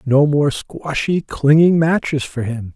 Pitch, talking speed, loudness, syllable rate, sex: 145 Hz, 150 wpm, -17 LUFS, 3.8 syllables/s, male